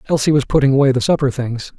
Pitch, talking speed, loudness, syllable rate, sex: 135 Hz, 235 wpm, -16 LUFS, 7.1 syllables/s, male